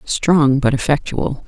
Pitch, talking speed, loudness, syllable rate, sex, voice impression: 140 Hz, 120 wpm, -16 LUFS, 3.7 syllables/s, female, feminine, middle-aged, slightly relaxed, slightly weak, clear, raspy, nasal, calm, reassuring, elegant, slightly sharp, modest